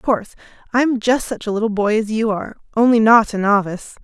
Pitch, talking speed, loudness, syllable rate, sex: 220 Hz, 240 wpm, -17 LUFS, 6.7 syllables/s, female